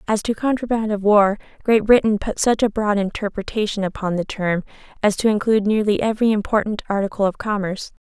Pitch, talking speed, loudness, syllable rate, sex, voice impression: 210 Hz, 180 wpm, -20 LUFS, 6.1 syllables/s, female, very feminine, young, very thin, tensed, slightly powerful, very bright, slightly soft, very clear, very fluent, very cute, very intellectual, refreshing, sincere, very calm, very friendly, very reassuring, slightly unique, very elegant, slightly wild, very sweet, slightly lively, very kind, slightly modest